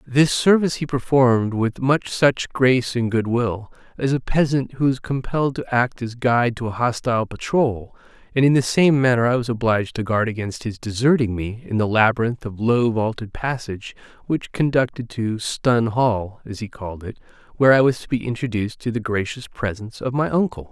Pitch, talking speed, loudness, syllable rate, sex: 120 Hz, 195 wpm, -20 LUFS, 5.3 syllables/s, male